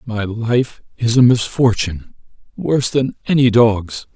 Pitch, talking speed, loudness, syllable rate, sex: 115 Hz, 130 wpm, -16 LUFS, 4.2 syllables/s, male